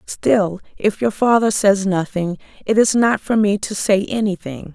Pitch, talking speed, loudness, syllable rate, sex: 200 Hz, 175 wpm, -18 LUFS, 4.3 syllables/s, female